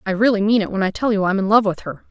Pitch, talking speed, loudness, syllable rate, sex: 205 Hz, 370 wpm, -18 LUFS, 7.1 syllables/s, female